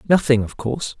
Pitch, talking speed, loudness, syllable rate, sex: 130 Hz, 180 wpm, -20 LUFS, 6.2 syllables/s, male